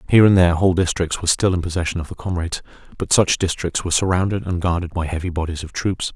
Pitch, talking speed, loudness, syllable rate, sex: 90 Hz, 235 wpm, -19 LUFS, 7.1 syllables/s, male